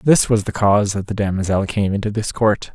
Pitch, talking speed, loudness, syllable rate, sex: 105 Hz, 240 wpm, -18 LUFS, 5.6 syllables/s, male